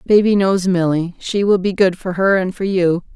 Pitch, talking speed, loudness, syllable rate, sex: 185 Hz, 230 wpm, -16 LUFS, 4.8 syllables/s, female